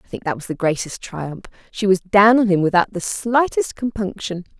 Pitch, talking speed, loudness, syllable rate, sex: 200 Hz, 210 wpm, -19 LUFS, 5.1 syllables/s, female